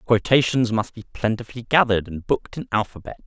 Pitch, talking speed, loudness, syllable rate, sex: 110 Hz, 165 wpm, -22 LUFS, 6.3 syllables/s, male